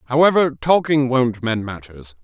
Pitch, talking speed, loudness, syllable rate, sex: 130 Hz, 135 wpm, -17 LUFS, 4.6 syllables/s, male